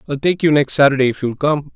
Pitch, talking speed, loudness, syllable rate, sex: 140 Hz, 275 wpm, -16 LUFS, 6.5 syllables/s, male